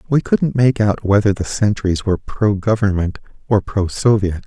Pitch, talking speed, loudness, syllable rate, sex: 105 Hz, 175 wpm, -17 LUFS, 4.8 syllables/s, male